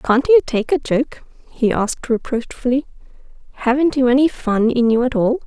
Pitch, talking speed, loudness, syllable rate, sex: 245 Hz, 175 wpm, -17 LUFS, 5.0 syllables/s, female